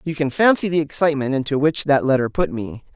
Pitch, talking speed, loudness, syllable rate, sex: 145 Hz, 225 wpm, -19 LUFS, 6.1 syllables/s, male